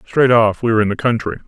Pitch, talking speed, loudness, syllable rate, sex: 115 Hz, 285 wpm, -15 LUFS, 7.0 syllables/s, male